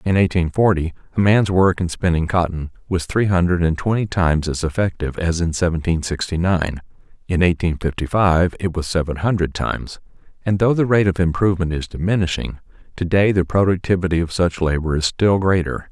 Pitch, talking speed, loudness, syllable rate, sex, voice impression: 90 Hz, 185 wpm, -19 LUFS, 5.6 syllables/s, male, masculine, adult-like, hard, clear, fluent, cool, intellectual, calm, reassuring, elegant, slightly wild, kind